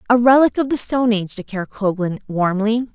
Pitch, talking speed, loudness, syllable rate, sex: 220 Hz, 185 wpm, -18 LUFS, 6.1 syllables/s, female